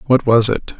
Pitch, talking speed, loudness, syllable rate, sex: 120 Hz, 225 wpm, -14 LUFS, 4.9 syllables/s, male